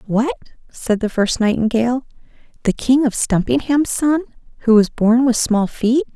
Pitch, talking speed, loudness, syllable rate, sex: 240 Hz, 145 wpm, -17 LUFS, 4.8 syllables/s, female